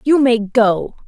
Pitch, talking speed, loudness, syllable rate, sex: 235 Hz, 165 wpm, -15 LUFS, 3.4 syllables/s, female